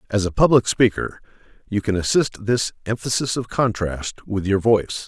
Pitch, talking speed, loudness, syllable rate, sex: 105 Hz, 165 wpm, -21 LUFS, 4.9 syllables/s, male